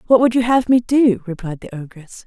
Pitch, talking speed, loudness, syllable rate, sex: 215 Hz, 240 wpm, -16 LUFS, 5.4 syllables/s, female